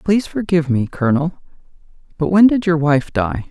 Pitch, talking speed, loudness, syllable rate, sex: 160 Hz, 170 wpm, -16 LUFS, 5.6 syllables/s, male